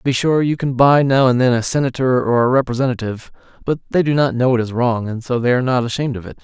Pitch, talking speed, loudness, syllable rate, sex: 125 Hz, 280 wpm, -17 LUFS, 6.8 syllables/s, male